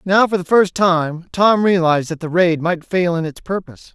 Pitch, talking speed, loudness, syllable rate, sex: 175 Hz, 230 wpm, -17 LUFS, 5.0 syllables/s, male